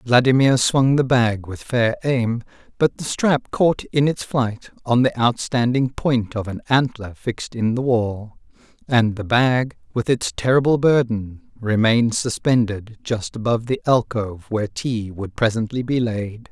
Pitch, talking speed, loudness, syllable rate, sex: 120 Hz, 160 wpm, -20 LUFS, 4.3 syllables/s, male